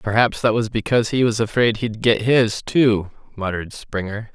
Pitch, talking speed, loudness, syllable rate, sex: 110 Hz, 180 wpm, -19 LUFS, 5.0 syllables/s, male